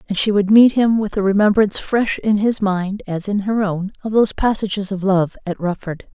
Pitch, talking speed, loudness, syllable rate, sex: 200 Hz, 225 wpm, -17 LUFS, 5.3 syllables/s, female